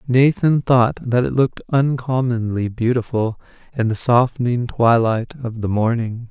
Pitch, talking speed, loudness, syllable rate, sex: 120 Hz, 135 wpm, -18 LUFS, 4.5 syllables/s, male